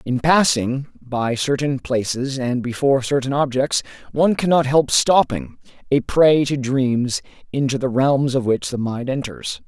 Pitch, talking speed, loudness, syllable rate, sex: 130 Hz, 150 wpm, -19 LUFS, 4.3 syllables/s, male